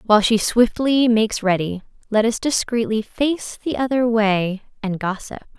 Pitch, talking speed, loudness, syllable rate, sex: 225 Hz, 150 wpm, -19 LUFS, 4.6 syllables/s, female